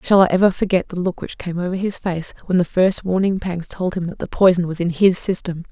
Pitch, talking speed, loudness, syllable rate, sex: 180 Hz, 260 wpm, -19 LUFS, 5.7 syllables/s, female